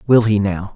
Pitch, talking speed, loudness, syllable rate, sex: 105 Hz, 240 wpm, -16 LUFS, 4.9 syllables/s, male